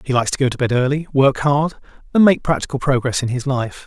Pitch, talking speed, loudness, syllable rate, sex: 135 Hz, 250 wpm, -18 LUFS, 6.3 syllables/s, male